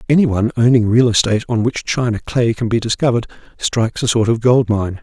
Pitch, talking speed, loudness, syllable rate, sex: 115 Hz, 205 wpm, -16 LUFS, 6.1 syllables/s, male